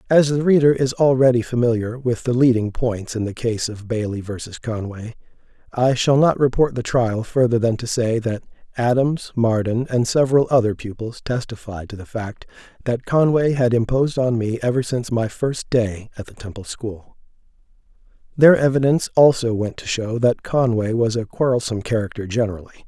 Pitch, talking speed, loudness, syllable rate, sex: 120 Hz, 175 wpm, -19 LUFS, 5.3 syllables/s, male